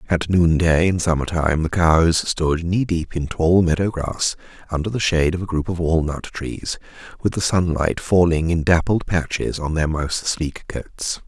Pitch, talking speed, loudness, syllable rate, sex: 85 Hz, 180 wpm, -20 LUFS, 4.6 syllables/s, male